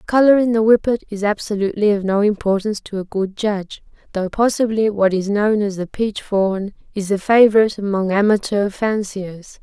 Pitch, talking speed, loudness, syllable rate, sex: 205 Hz, 175 wpm, -18 LUFS, 5.3 syllables/s, female